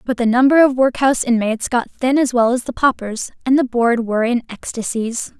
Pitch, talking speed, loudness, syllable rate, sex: 245 Hz, 210 wpm, -17 LUFS, 5.5 syllables/s, female